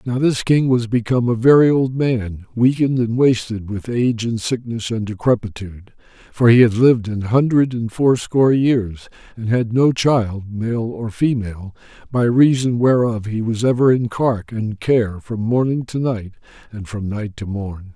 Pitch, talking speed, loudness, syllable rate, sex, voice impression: 115 Hz, 175 wpm, -18 LUFS, 4.6 syllables/s, male, very masculine, very adult-like, very old, very thick, very relaxed, powerful, dark, very soft, very muffled, slightly fluent, raspy, cool, intellectual, very sincere, very calm, very mature, friendly, reassuring, very unique, slightly elegant, very wild, slightly sweet, slightly strict, slightly intense, very modest